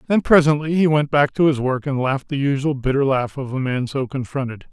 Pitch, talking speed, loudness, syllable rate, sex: 140 Hz, 240 wpm, -19 LUFS, 5.7 syllables/s, male